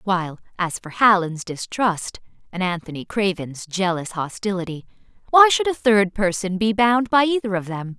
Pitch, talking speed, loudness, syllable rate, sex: 200 Hz, 160 wpm, -20 LUFS, 4.8 syllables/s, female